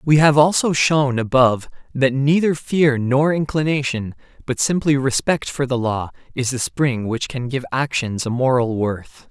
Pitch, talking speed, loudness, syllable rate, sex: 135 Hz, 170 wpm, -19 LUFS, 4.4 syllables/s, male